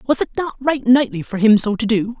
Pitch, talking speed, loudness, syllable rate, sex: 235 Hz, 275 wpm, -17 LUFS, 5.5 syllables/s, female